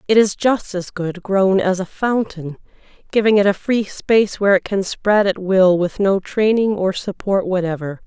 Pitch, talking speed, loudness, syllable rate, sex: 195 Hz, 195 wpm, -17 LUFS, 4.6 syllables/s, female